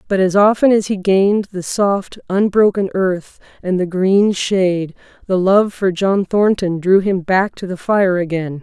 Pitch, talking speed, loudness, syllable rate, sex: 190 Hz, 180 wpm, -16 LUFS, 4.3 syllables/s, female